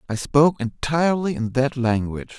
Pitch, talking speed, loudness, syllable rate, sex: 135 Hz, 150 wpm, -21 LUFS, 5.6 syllables/s, male